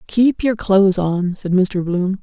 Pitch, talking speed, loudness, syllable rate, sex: 195 Hz, 190 wpm, -17 LUFS, 3.9 syllables/s, female